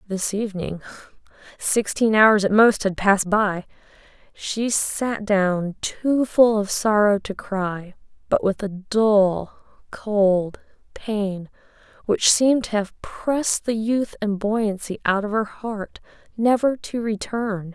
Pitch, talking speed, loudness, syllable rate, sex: 210 Hz, 130 wpm, -21 LUFS, 3.5 syllables/s, female